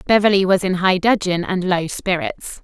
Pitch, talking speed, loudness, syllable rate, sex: 185 Hz, 180 wpm, -18 LUFS, 4.9 syllables/s, female